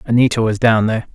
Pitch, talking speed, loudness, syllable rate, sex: 115 Hz, 210 wpm, -15 LUFS, 6.9 syllables/s, male